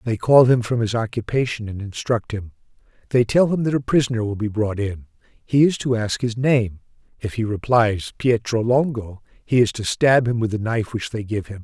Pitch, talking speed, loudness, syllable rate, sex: 115 Hz, 215 wpm, -20 LUFS, 5.2 syllables/s, male